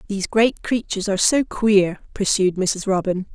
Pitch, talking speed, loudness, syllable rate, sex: 200 Hz, 160 wpm, -20 LUFS, 5.0 syllables/s, female